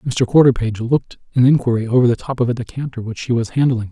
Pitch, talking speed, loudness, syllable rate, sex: 125 Hz, 230 wpm, -17 LUFS, 6.7 syllables/s, male